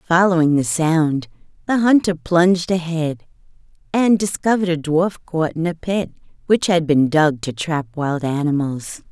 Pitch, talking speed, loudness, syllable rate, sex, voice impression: 165 Hz, 150 wpm, -18 LUFS, 4.5 syllables/s, female, feminine, very adult-like, slightly bright, slightly refreshing, slightly calm, friendly, slightly reassuring